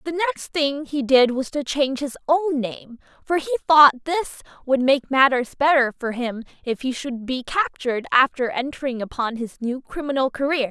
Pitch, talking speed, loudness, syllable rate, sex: 270 Hz, 185 wpm, -21 LUFS, 4.9 syllables/s, female